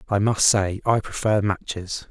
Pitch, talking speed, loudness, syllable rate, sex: 100 Hz, 170 wpm, -22 LUFS, 4.2 syllables/s, male